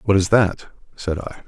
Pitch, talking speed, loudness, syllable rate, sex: 95 Hz, 205 wpm, -20 LUFS, 4.3 syllables/s, male